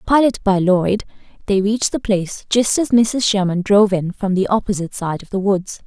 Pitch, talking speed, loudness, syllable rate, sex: 200 Hz, 205 wpm, -17 LUFS, 5.5 syllables/s, female